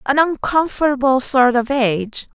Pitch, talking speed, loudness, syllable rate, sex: 265 Hz, 125 wpm, -17 LUFS, 4.6 syllables/s, female